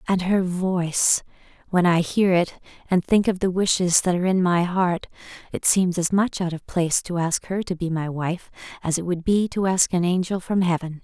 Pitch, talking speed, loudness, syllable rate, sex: 180 Hz, 225 wpm, -22 LUFS, 5.0 syllables/s, female